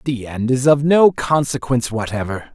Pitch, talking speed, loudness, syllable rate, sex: 130 Hz, 165 wpm, -17 LUFS, 5.0 syllables/s, male